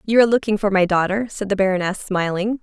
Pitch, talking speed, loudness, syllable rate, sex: 200 Hz, 230 wpm, -19 LUFS, 6.4 syllables/s, female